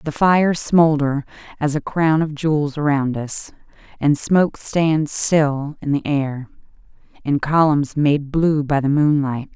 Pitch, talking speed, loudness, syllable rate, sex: 150 Hz, 150 wpm, -18 LUFS, 4.0 syllables/s, female